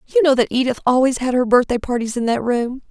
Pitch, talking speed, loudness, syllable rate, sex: 250 Hz, 250 wpm, -18 LUFS, 6.5 syllables/s, female